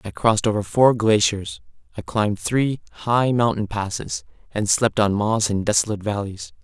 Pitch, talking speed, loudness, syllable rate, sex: 110 Hz, 165 wpm, -21 LUFS, 5.0 syllables/s, male